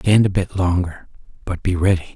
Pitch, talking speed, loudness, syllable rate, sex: 90 Hz, 195 wpm, -19 LUFS, 5.5 syllables/s, male